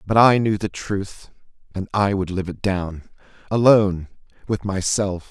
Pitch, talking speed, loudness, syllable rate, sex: 100 Hz, 145 wpm, -20 LUFS, 4.5 syllables/s, male